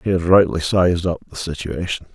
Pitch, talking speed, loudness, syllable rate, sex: 85 Hz, 195 wpm, -19 LUFS, 5.6 syllables/s, male